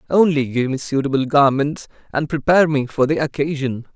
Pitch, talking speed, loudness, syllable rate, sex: 145 Hz, 165 wpm, -18 LUFS, 5.5 syllables/s, male